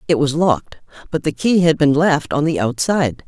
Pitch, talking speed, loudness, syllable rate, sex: 155 Hz, 220 wpm, -17 LUFS, 5.4 syllables/s, female